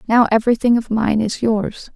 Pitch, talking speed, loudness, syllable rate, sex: 225 Hz, 185 wpm, -17 LUFS, 5.1 syllables/s, female